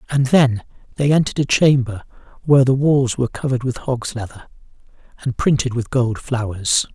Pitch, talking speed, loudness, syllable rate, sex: 125 Hz, 165 wpm, -18 LUFS, 5.5 syllables/s, male